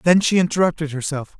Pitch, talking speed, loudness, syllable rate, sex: 165 Hz, 170 wpm, -19 LUFS, 6.3 syllables/s, male